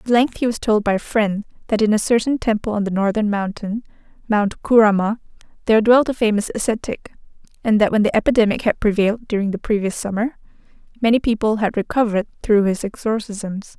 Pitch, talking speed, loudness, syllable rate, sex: 215 Hz, 185 wpm, -19 LUFS, 5.8 syllables/s, female